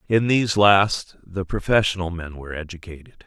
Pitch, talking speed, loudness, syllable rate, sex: 95 Hz, 145 wpm, -21 LUFS, 5.2 syllables/s, male